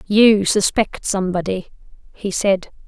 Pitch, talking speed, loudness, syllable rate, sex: 195 Hz, 105 wpm, -18 LUFS, 4.3 syllables/s, female